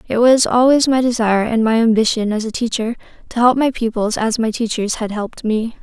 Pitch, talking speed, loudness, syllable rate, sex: 230 Hz, 215 wpm, -16 LUFS, 5.6 syllables/s, female